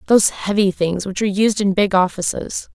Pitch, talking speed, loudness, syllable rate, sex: 195 Hz, 195 wpm, -18 LUFS, 5.5 syllables/s, female